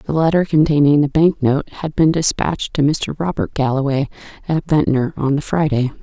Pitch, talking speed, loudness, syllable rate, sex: 145 Hz, 180 wpm, -17 LUFS, 5.1 syllables/s, female